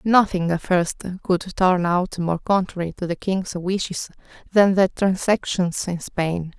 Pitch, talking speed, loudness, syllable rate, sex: 180 Hz, 155 wpm, -21 LUFS, 3.9 syllables/s, female